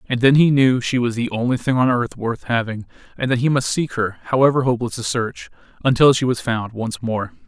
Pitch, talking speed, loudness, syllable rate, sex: 125 Hz, 235 wpm, -19 LUFS, 5.6 syllables/s, male